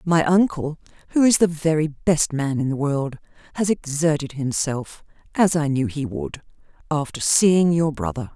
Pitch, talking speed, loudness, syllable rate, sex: 150 Hz, 165 wpm, -21 LUFS, 4.5 syllables/s, female